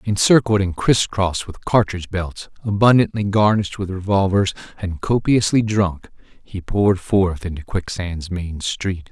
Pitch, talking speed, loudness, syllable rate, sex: 95 Hz, 140 wpm, -19 LUFS, 4.6 syllables/s, male